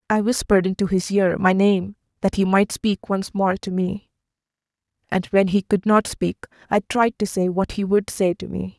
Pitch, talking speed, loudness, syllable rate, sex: 195 Hz, 210 wpm, -21 LUFS, 4.8 syllables/s, female